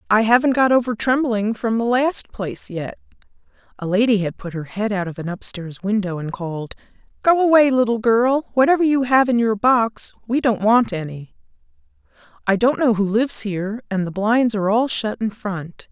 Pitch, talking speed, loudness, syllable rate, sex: 220 Hz, 190 wpm, -19 LUFS, 3.5 syllables/s, female